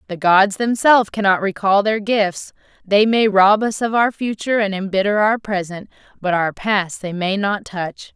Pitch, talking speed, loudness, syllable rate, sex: 200 Hz, 185 wpm, -17 LUFS, 4.6 syllables/s, female